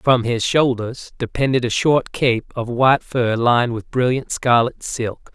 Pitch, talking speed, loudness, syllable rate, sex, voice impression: 120 Hz, 170 wpm, -19 LUFS, 4.2 syllables/s, male, masculine, adult-like, slightly middle-aged, thick, slightly tensed, slightly powerful, slightly bright, hard, slightly muffled, fluent, slightly cool, very intellectual, slightly refreshing, very sincere, very calm, slightly mature, slightly friendly, slightly reassuring, wild, slightly intense, slightly sharp